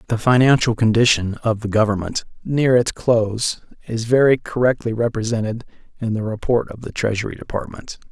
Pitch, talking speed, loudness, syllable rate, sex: 115 Hz, 150 wpm, -19 LUFS, 5.4 syllables/s, male